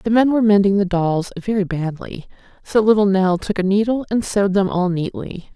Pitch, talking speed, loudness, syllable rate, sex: 195 Hz, 205 wpm, -18 LUFS, 5.3 syllables/s, female